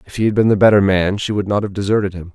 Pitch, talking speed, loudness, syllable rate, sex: 100 Hz, 335 wpm, -16 LUFS, 7.1 syllables/s, male